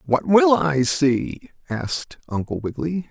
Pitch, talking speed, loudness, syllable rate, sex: 150 Hz, 135 wpm, -21 LUFS, 4.1 syllables/s, male